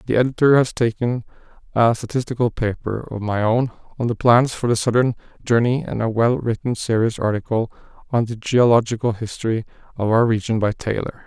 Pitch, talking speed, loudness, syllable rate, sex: 115 Hz, 170 wpm, -20 LUFS, 5.6 syllables/s, male